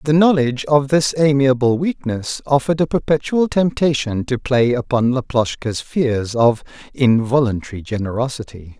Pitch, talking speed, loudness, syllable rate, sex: 130 Hz, 125 wpm, -17 LUFS, 4.8 syllables/s, male